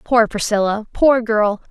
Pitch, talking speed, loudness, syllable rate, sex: 220 Hz, 105 wpm, -17 LUFS, 4.1 syllables/s, female